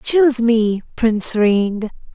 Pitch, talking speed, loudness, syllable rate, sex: 230 Hz, 110 wpm, -16 LUFS, 3.4 syllables/s, female